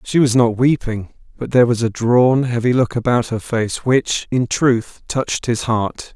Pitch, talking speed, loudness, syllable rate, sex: 120 Hz, 195 wpm, -17 LUFS, 4.4 syllables/s, male